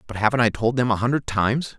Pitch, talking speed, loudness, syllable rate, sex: 115 Hz, 270 wpm, -21 LUFS, 6.8 syllables/s, male